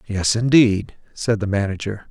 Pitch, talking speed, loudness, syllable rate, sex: 105 Hz, 145 wpm, -19 LUFS, 4.4 syllables/s, male